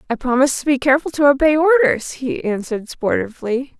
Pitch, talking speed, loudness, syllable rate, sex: 270 Hz, 175 wpm, -17 LUFS, 6.1 syllables/s, female